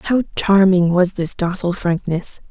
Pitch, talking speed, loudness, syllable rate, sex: 180 Hz, 145 wpm, -17 LUFS, 4.4 syllables/s, female